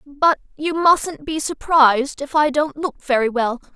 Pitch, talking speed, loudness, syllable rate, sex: 290 Hz, 175 wpm, -18 LUFS, 4.2 syllables/s, female